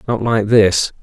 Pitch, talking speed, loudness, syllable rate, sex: 105 Hz, 175 wpm, -14 LUFS, 3.8 syllables/s, male